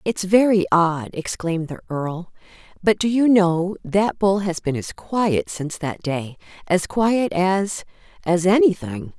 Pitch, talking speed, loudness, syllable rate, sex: 185 Hz, 145 wpm, -20 LUFS, 4.0 syllables/s, female